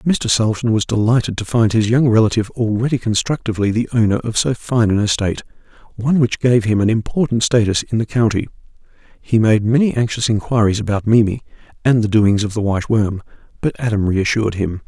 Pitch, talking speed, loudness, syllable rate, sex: 110 Hz, 180 wpm, -17 LUFS, 6.1 syllables/s, male